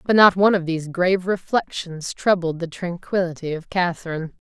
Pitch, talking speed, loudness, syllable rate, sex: 175 Hz, 165 wpm, -21 LUFS, 5.6 syllables/s, female